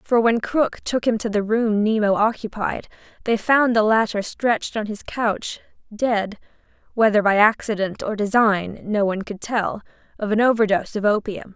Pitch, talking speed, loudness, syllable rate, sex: 215 Hz, 170 wpm, -20 LUFS, 3.7 syllables/s, female